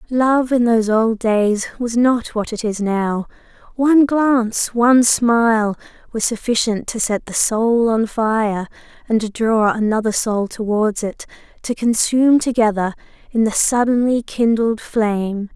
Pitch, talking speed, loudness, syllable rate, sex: 225 Hz, 140 wpm, -17 LUFS, 4.2 syllables/s, female